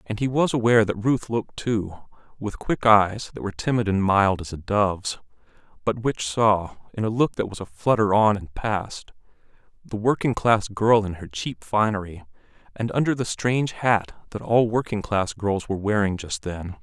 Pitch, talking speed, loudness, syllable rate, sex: 105 Hz, 195 wpm, -23 LUFS, 4.9 syllables/s, male